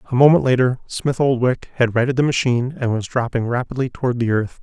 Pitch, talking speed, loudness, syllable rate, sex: 125 Hz, 210 wpm, -19 LUFS, 6.2 syllables/s, male